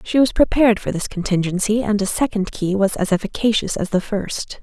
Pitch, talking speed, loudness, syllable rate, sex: 205 Hz, 210 wpm, -19 LUFS, 5.5 syllables/s, female